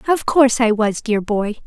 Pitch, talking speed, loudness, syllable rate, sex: 230 Hz, 215 wpm, -17 LUFS, 4.8 syllables/s, female